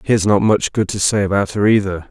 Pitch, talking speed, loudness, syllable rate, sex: 100 Hz, 285 wpm, -16 LUFS, 6.0 syllables/s, male